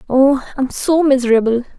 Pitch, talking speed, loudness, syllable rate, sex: 265 Hz, 135 wpm, -15 LUFS, 5.2 syllables/s, female